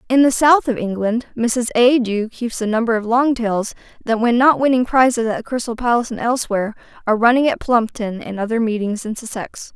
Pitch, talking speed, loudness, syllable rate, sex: 230 Hz, 205 wpm, -18 LUFS, 5.8 syllables/s, female